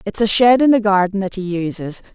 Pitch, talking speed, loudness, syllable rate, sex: 200 Hz, 250 wpm, -15 LUFS, 5.7 syllables/s, female